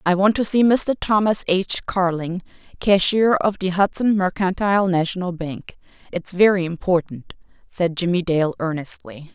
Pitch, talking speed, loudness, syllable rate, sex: 185 Hz, 135 wpm, -20 LUFS, 4.6 syllables/s, female